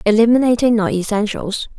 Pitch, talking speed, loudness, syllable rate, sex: 225 Hz, 100 wpm, -16 LUFS, 5.7 syllables/s, female